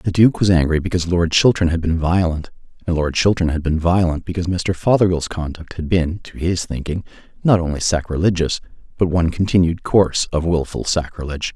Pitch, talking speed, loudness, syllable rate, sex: 85 Hz, 175 wpm, -18 LUFS, 5.8 syllables/s, male